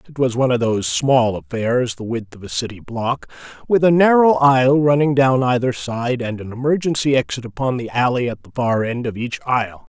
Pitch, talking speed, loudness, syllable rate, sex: 125 Hz, 210 wpm, -18 LUFS, 5.5 syllables/s, male